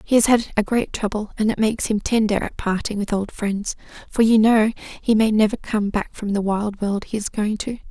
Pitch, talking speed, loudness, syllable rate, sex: 215 Hz, 245 wpm, -21 LUFS, 5.2 syllables/s, female